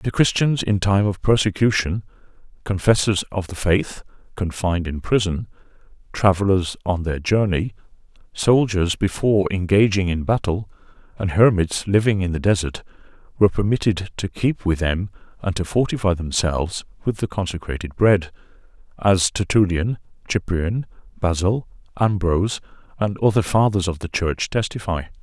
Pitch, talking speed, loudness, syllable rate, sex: 95 Hz, 125 wpm, -21 LUFS, 5.0 syllables/s, male